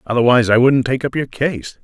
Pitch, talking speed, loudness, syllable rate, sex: 125 Hz, 230 wpm, -15 LUFS, 5.9 syllables/s, male